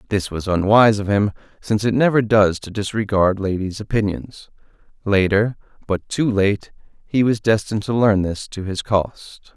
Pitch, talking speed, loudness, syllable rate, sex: 105 Hz, 155 wpm, -19 LUFS, 4.8 syllables/s, male